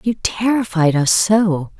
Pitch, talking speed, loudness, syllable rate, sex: 190 Hz, 135 wpm, -16 LUFS, 3.6 syllables/s, female